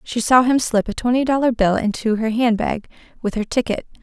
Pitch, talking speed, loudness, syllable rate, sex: 230 Hz, 210 wpm, -19 LUFS, 5.5 syllables/s, female